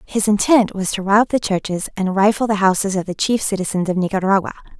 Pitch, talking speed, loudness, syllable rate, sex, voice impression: 200 Hz, 215 wpm, -18 LUFS, 5.9 syllables/s, female, feminine, adult-like, slightly soft, fluent, refreshing, friendly, kind